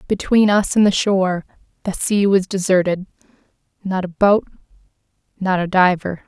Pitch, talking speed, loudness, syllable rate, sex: 190 Hz, 145 wpm, -17 LUFS, 5.0 syllables/s, female